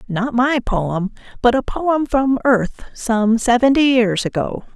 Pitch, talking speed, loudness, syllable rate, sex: 240 Hz, 140 wpm, -17 LUFS, 3.7 syllables/s, female